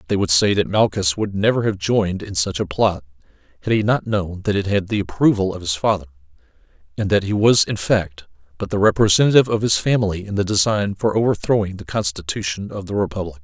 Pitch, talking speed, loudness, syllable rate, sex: 95 Hz, 210 wpm, -19 LUFS, 6.1 syllables/s, male